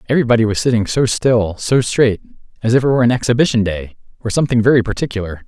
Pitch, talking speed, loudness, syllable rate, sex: 115 Hz, 185 wpm, -15 LUFS, 7.2 syllables/s, male